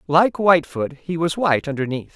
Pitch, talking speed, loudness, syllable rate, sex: 160 Hz, 165 wpm, -20 LUFS, 5.5 syllables/s, male